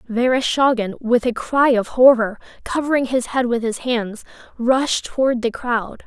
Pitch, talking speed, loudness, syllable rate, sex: 245 Hz, 160 wpm, -18 LUFS, 4.4 syllables/s, female